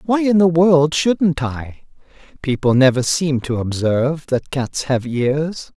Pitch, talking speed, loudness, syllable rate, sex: 145 Hz, 155 wpm, -17 LUFS, 3.8 syllables/s, male